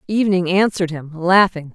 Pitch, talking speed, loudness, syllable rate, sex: 180 Hz, 140 wpm, -17 LUFS, 5.8 syllables/s, female